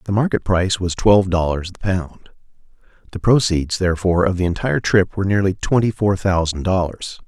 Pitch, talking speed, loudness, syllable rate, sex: 95 Hz, 175 wpm, -18 LUFS, 5.7 syllables/s, male